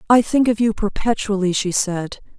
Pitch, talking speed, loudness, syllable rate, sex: 210 Hz, 175 wpm, -19 LUFS, 5.0 syllables/s, female